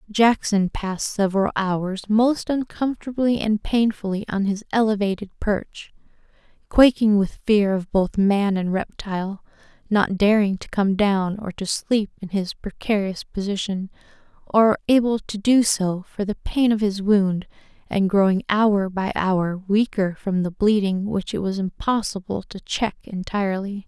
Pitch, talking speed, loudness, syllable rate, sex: 205 Hz, 150 wpm, -22 LUFS, 4.3 syllables/s, female